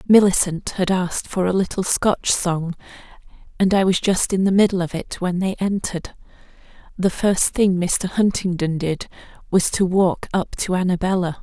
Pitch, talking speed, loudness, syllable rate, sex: 185 Hz, 170 wpm, -20 LUFS, 4.8 syllables/s, female